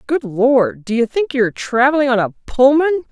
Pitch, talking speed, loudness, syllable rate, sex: 260 Hz, 195 wpm, -15 LUFS, 5.3 syllables/s, female